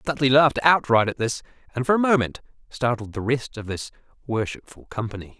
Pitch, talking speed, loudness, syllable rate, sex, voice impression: 125 Hz, 180 wpm, -22 LUFS, 6.0 syllables/s, male, masculine, adult-like, slightly fluent, refreshing, unique